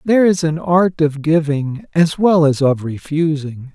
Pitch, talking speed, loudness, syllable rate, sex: 155 Hz, 175 wpm, -16 LUFS, 4.2 syllables/s, male